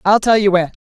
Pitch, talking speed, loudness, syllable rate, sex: 200 Hz, 285 wpm, -14 LUFS, 6.3 syllables/s, female